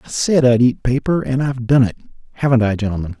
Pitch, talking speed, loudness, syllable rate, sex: 125 Hz, 225 wpm, -16 LUFS, 6.4 syllables/s, male